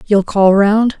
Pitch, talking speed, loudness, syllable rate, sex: 205 Hz, 180 wpm, -12 LUFS, 3.6 syllables/s, female